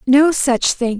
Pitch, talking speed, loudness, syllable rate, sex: 265 Hz, 180 wpm, -15 LUFS, 3.5 syllables/s, female